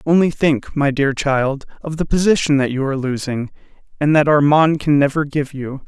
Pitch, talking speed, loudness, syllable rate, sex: 145 Hz, 195 wpm, -17 LUFS, 5.1 syllables/s, male